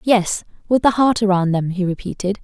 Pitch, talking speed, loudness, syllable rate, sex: 200 Hz, 195 wpm, -18 LUFS, 5.4 syllables/s, female